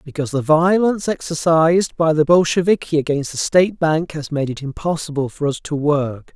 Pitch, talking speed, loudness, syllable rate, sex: 155 Hz, 180 wpm, -18 LUFS, 5.5 syllables/s, male